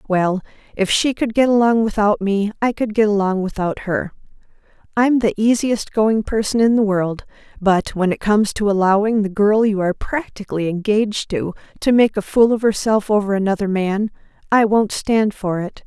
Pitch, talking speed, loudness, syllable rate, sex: 210 Hz, 185 wpm, -18 LUFS, 5.0 syllables/s, female